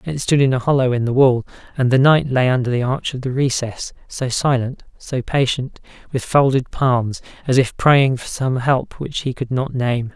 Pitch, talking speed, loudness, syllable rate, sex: 130 Hz, 215 wpm, -18 LUFS, 4.7 syllables/s, male